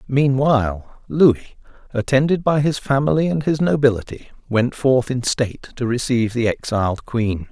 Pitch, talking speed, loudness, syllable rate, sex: 130 Hz, 145 wpm, -19 LUFS, 5.1 syllables/s, male